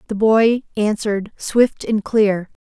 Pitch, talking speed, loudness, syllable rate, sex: 215 Hz, 135 wpm, -18 LUFS, 3.7 syllables/s, female